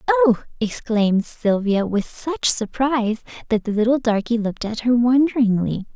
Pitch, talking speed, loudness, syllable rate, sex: 235 Hz, 140 wpm, -20 LUFS, 4.8 syllables/s, female